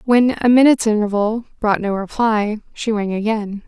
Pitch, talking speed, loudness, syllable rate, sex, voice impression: 220 Hz, 165 wpm, -17 LUFS, 4.9 syllables/s, female, very feminine, slightly adult-like, soft, slightly cute, calm, reassuring, sweet, kind